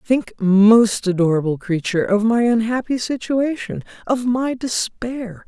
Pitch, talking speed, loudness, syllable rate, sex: 225 Hz, 120 wpm, -18 LUFS, 4.1 syllables/s, female